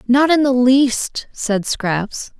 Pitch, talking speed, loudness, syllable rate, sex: 250 Hz, 150 wpm, -16 LUFS, 2.8 syllables/s, female